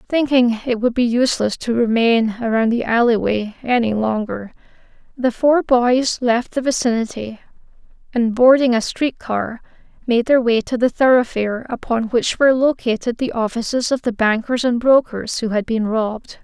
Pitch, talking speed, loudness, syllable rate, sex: 235 Hz, 160 wpm, -18 LUFS, 4.9 syllables/s, female